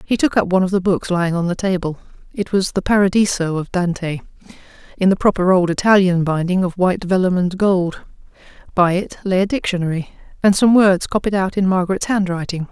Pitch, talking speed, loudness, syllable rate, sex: 185 Hz, 200 wpm, -17 LUFS, 5.9 syllables/s, female